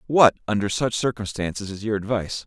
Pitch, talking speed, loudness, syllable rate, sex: 105 Hz, 170 wpm, -23 LUFS, 6.0 syllables/s, male